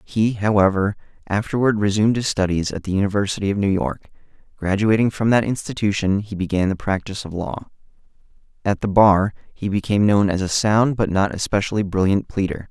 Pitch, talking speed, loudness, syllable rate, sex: 100 Hz, 170 wpm, -20 LUFS, 5.8 syllables/s, male